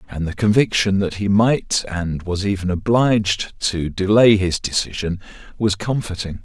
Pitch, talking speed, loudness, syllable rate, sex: 100 Hz, 150 wpm, -19 LUFS, 4.5 syllables/s, male